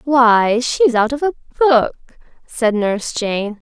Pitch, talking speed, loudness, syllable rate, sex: 245 Hz, 145 wpm, -16 LUFS, 3.7 syllables/s, female